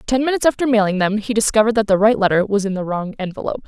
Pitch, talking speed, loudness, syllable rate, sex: 215 Hz, 260 wpm, -17 LUFS, 7.7 syllables/s, female